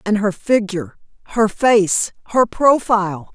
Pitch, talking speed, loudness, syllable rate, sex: 210 Hz, 125 wpm, -17 LUFS, 4.2 syllables/s, female